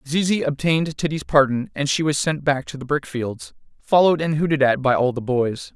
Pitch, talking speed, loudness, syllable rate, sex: 145 Hz, 220 wpm, -20 LUFS, 5.4 syllables/s, male